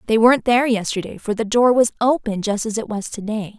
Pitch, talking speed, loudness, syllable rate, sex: 225 Hz, 250 wpm, -19 LUFS, 6.1 syllables/s, female